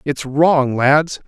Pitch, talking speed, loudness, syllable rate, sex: 145 Hz, 140 wpm, -15 LUFS, 2.6 syllables/s, male